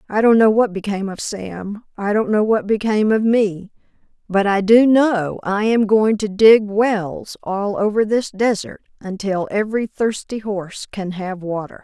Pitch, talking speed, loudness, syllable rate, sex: 205 Hz, 175 wpm, -18 LUFS, 4.5 syllables/s, female